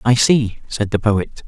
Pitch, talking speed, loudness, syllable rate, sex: 110 Hz, 205 wpm, -17 LUFS, 3.9 syllables/s, male